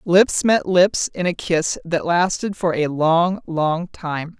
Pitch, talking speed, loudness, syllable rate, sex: 175 Hz, 175 wpm, -19 LUFS, 3.4 syllables/s, female